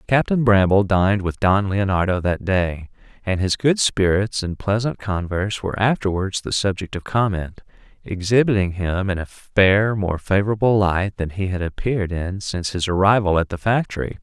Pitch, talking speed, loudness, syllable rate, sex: 100 Hz, 170 wpm, -20 LUFS, 5.0 syllables/s, male